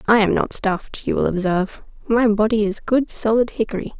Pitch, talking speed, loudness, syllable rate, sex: 215 Hz, 195 wpm, -20 LUFS, 5.7 syllables/s, female